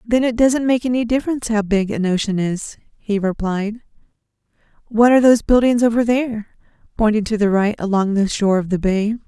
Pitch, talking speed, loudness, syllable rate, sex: 220 Hz, 190 wpm, -17 LUFS, 5.8 syllables/s, female